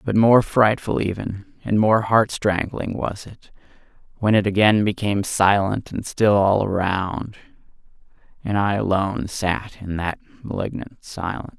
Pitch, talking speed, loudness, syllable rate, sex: 100 Hz, 140 wpm, -21 LUFS, 4.3 syllables/s, male